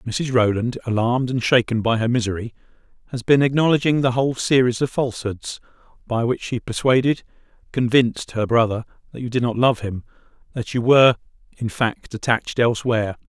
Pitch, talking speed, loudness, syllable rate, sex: 120 Hz, 160 wpm, -20 LUFS, 5.8 syllables/s, male